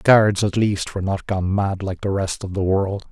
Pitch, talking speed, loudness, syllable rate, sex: 100 Hz, 270 wpm, -21 LUFS, 5.1 syllables/s, male